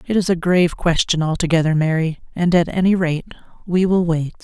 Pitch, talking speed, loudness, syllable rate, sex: 170 Hz, 190 wpm, -18 LUFS, 5.6 syllables/s, female